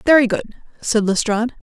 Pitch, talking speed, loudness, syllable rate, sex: 230 Hz, 140 wpm, -18 LUFS, 6.5 syllables/s, female